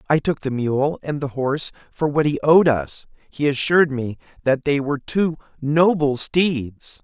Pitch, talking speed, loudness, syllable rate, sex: 140 Hz, 180 wpm, -20 LUFS, 4.4 syllables/s, male